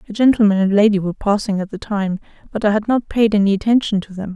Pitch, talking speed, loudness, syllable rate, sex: 205 Hz, 250 wpm, -17 LUFS, 6.8 syllables/s, female